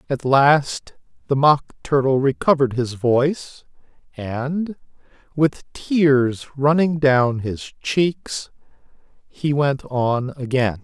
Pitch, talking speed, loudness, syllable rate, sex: 135 Hz, 105 wpm, -19 LUFS, 3.2 syllables/s, male